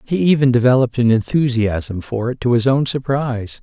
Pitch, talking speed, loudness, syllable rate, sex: 125 Hz, 180 wpm, -17 LUFS, 5.4 syllables/s, male